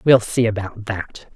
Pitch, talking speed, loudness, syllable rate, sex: 110 Hz, 175 wpm, -20 LUFS, 4.0 syllables/s, male